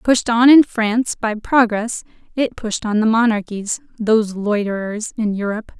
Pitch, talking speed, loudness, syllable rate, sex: 220 Hz, 155 wpm, -17 LUFS, 4.7 syllables/s, female